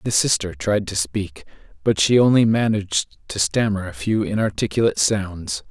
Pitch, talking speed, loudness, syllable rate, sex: 100 Hz, 160 wpm, -20 LUFS, 5.0 syllables/s, male